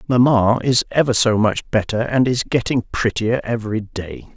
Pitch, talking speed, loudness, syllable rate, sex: 115 Hz, 165 wpm, -18 LUFS, 4.7 syllables/s, male